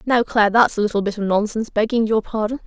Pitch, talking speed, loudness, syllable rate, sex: 215 Hz, 250 wpm, -19 LUFS, 6.8 syllables/s, female